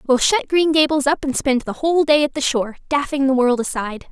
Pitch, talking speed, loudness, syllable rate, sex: 280 Hz, 250 wpm, -18 LUFS, 5.9 syllables/s, female